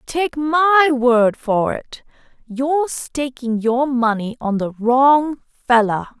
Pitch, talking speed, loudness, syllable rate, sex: 260 Hz, 125 wpm, -17 LUFS, 3.4 syllables/s, female